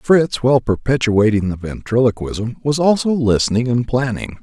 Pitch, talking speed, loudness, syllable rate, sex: 120 Hz, 135 wpm, -17 LUFS, 4.9 syllables/s, male